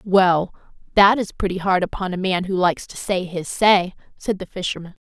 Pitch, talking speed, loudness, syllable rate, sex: 185 Hz, 200 wpm, -20 LUFS, 5.2 syllables/s, female